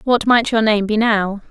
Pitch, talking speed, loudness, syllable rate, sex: 220 Hz, 240 wpm, -16 LUFS, 4.4 syllables/s, female